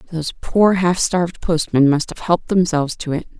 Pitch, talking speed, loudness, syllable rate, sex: 165 Hz, 195 wpm, -18 LUFS, 5.6 syllables/s, female